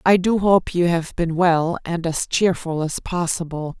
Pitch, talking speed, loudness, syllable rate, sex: 170 Hz, 190 wpm, -20 LUFS, 4.1 syllables/s, female